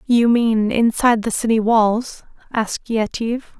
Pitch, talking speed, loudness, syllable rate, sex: 225 Hz, 135 wpm, -18 LUFS, 4.4 syllables/s, female